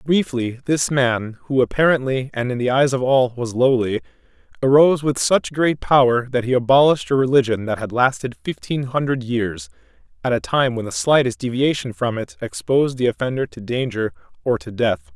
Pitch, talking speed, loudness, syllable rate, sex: 125 Hz, 180 wpm, -19 LUFS, 5.2 syllables/s, male